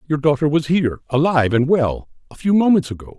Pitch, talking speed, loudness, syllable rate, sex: 150 Hz, 205 wpm, -17 LUFS, 6.3 syllables/s, male